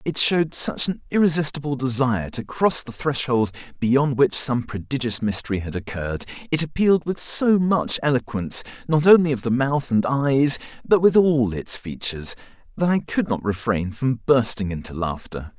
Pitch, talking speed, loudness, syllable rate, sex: 130 Hz, 170 wpm, -21 LUFS, 5.0 syllables/s, male